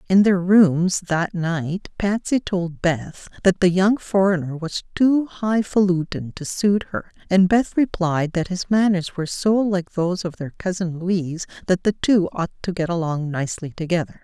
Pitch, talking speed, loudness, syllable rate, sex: 180 Hz, 175 wpm, -21 LUFS, 4.5 syllables/s, female